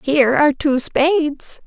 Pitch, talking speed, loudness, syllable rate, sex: 280 Hz, 145 wpm, -16 LUFS, 4.6 syllables/s, female